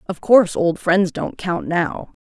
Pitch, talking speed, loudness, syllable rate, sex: 180 Hz, 185 wpm, -18 LUFS, 4.0 syllables/s, female